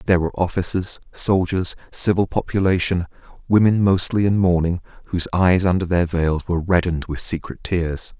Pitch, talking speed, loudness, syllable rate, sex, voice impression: 90 Hz, 145 wpm, -20 LUFS, 5.4 syllables/s, male, very masculine, very adult-like, old, very thick, tensed, powerful, slightly dark, slightly hard, muffled, slightly fluent, slightly raspy, cool, very intellectual, sincere, very calm, very mature, friendly, very reassuring, very unique, elegant, wild, slightly sweet, slightly lively, kind, slightly modest